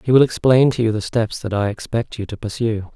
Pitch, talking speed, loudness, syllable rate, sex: 115 Hz, 265 wpm, -19 LUFS, 5.6 syllables/s, male